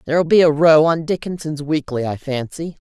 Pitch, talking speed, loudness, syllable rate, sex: 155 Hz, 210 wpm, -17 LUFS, 5.6 syllables/s, female